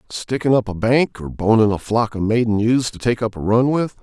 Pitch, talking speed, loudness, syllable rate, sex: 115 Hz, 255 wpm, -18 LUFS, 5.3 syllables/s, male